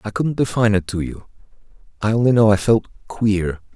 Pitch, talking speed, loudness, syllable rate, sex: 105 Hz, 190 wpm, -19 LUFS, 5.8 syllables/s, male